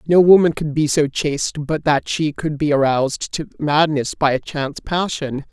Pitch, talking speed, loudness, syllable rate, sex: 150 Hz, 195 wpm, -18 LUFS, 4.6 syllables/s, male